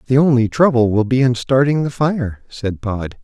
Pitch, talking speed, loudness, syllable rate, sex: 125 Hz, 205 wpm, -16 LUFS, 4.7 syllables/s, male